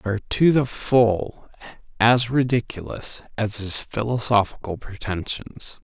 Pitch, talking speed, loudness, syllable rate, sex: 110 Hz, 110 wpm, -22 LUFS, 4.1 syllables/s, male